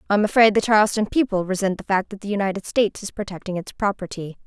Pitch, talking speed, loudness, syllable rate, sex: 200 Hz, 230 wpm, -21 LUFS, 6.9 syllables/s, female